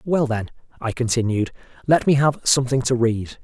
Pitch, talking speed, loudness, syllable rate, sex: 125 Hz, 175 wpm, -20 LUFS, 5.3 syllables/s, male